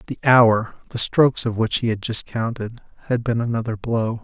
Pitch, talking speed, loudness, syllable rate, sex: 115 Hz, 200 wpm, -20 LUFS, 5.0 syllables/s, male